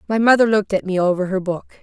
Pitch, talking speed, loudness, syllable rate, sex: 195 Hz, 260 wpm, -18 LUFS, 6.7 syllables/s, female